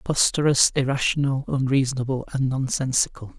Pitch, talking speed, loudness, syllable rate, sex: 135 Hz, 90 wpm, -22 LUFS, 5.7 syllables/s, male